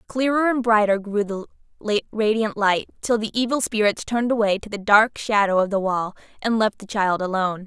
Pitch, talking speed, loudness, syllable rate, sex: 210 Hz, 195 wpm, -21 LUFS, 5.6 syllables/s, female